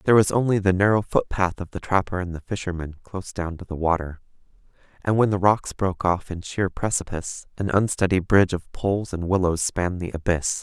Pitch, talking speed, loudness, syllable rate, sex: 95 Hz, 205 wpm, -23 LUFS, 5.9 syllables/s, male